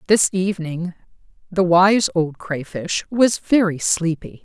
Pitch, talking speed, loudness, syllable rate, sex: 180 Hz, 120 wpm, -19 LUFS, 3.9 syllables/s, female